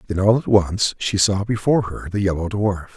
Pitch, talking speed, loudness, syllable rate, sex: 100 Hz, 225 wpm, -19 LUFS, 5.3 syllables/s, male